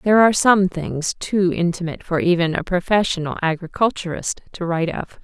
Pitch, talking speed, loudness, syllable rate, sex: 180 Hz, 160 wpm, -20 LUFS, 5.6 syllables/s, female